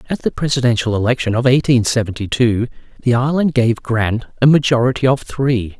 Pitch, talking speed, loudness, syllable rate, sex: 125 Hz, 165 wpm, -16 LUFS, 5.5 syllables/s, male